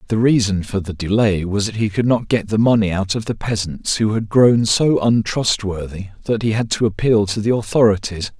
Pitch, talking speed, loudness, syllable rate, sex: 105 Hz, 215 wpm, -17 LUFS, 5.2 syllables/s, male